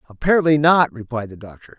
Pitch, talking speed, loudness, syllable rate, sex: 135 Hz, 170 wpm, -17 LUFS, 6.2 syllables/s, male